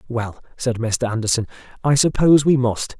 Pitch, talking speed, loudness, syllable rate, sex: 125 Hz, 160 wpm, -19 LUFS, 5.2 syllables/s, male